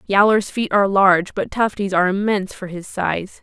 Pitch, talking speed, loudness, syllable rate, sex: 195 Hz, 195 wpm, -18 LUFS, 5.5 syllables/s, female